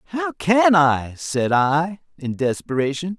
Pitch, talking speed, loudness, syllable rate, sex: 165 Hz, 130 wpm, -20 LUFS, 3.7 syllables/s, male